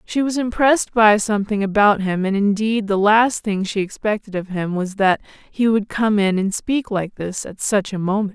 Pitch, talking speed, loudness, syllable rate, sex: 205 Hz, 215 wpm, -19 LUFS, 4.8 syllables/s, female